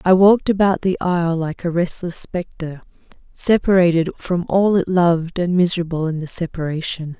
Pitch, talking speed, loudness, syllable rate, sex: 175 Hz, 160 wpm, -18 LUFS, 5.3 syllables/s, female